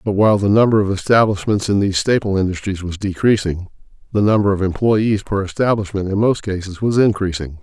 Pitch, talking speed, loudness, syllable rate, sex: 100 Hz, 180 wpm, -17 LUFS, 5.9 syllables/s, male